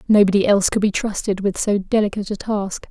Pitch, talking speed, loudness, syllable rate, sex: 200 Hz, 205 wpm, -19 LUFS, 6.2 syllables/s, female